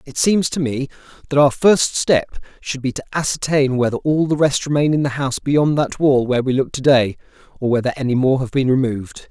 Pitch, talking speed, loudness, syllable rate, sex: 135 Hz, 225 wpm, -18 LUFS, 5.6 syllables/s, male